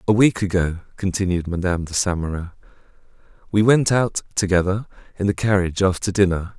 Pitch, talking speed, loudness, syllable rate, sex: 95 Hz, 155 wpm, -20 LUFS, 6.0 syllables/s, male